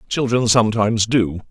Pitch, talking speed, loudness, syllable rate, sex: 110 Hz, 120 wpm, -17 LUFS, 5.6 syllables/s, male